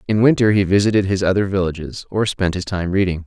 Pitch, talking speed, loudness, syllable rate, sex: 95 Hz, 220 wpm, -18 LUFS, 6.2 syllables/s, male